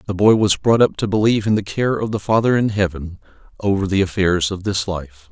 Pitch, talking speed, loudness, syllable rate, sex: 100 Hz, 235 wpm, -18 LUFS, 5.7 syllables/s, male